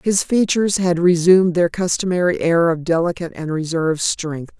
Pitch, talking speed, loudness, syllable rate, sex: 175 Hz, 155 wpm, -17 LUFS, 5.4 syllables/s, female